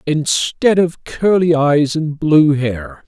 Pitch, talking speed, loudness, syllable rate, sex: 150 Hz, 135 wpm, -15 LUFS, 3.1 syllables/s, male